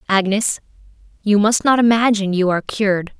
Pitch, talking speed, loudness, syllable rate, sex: 205 Hz, 150 wpm, -17 LUFS, 5.9 syllables/s, female